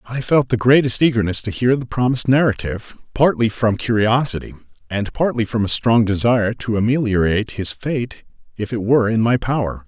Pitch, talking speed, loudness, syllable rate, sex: 115 Hz, 175 wpm, -18 LUFS, 5.6 syllables/s, male